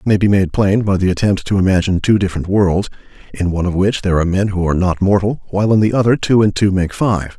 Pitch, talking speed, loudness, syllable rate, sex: 95 Hz, 270 wpm, -15 LUFS, 6.9 syllables/s, male